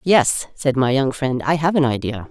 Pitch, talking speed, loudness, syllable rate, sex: 135 Hz, 235 wpm, -19 LUFS, 4.7 syllables/s, female